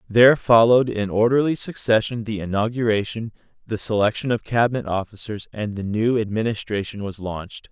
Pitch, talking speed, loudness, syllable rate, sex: 110 Hz, 140 wpm, -21 LUFS, 5.6 syllables/s, male